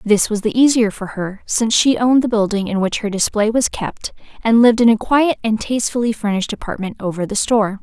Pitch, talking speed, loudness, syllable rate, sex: 220 Hz, 220 wpm, -17 LUFS, 6.0 syllables/s, female